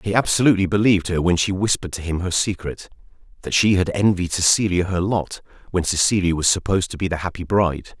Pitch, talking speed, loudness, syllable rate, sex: 90 Hz, 195 wpm, -20 LUFS, 6.4 syllables/s, male